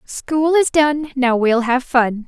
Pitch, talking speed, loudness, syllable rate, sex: 270 Hz, 185 wpm, -16 LUFS, 3.3 syllables/s, female